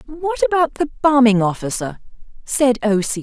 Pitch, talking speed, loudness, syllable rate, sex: 250 Hz, 150 wpm, -17 LUFS, 4.9 syllables/s, female